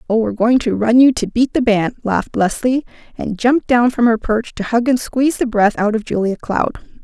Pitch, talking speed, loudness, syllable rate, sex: 230 Hz, 240 wpm, -16 LUFS, 5.4 syllables/s, female